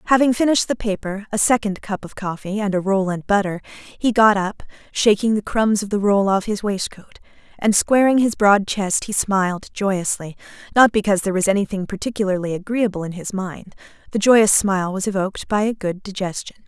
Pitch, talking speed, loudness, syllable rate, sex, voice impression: 200 Hz, 185 wpm, -19 LUFS, 5.6 syllables/s, female, very feminine, young, very thin, very tensed, slightly powerful, very bright, hard, very clear, very fluent, cute, slightly intellectual, slightly refreshing, sincere, calm, friendly, reassuring, unique, elegant, slightly wild, slightly sweet, lively, strict, intense